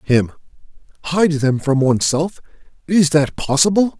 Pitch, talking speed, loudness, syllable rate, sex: 155 Hz, 105 wpm, -16 LUFS, 4.6 syllables/s, male